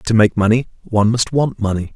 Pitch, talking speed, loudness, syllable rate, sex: 110 Hz, 215 wpm, -16 LUFS, 5.8 syllables/s, male